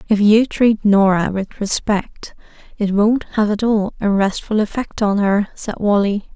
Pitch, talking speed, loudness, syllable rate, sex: 205 Hz, 170 wpm, -17 LUFS, 4.2 syllables/s, female